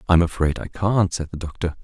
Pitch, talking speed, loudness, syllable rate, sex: 85 Hz, 260 wpm, -22 LUFS, 6.5 syllables/s, male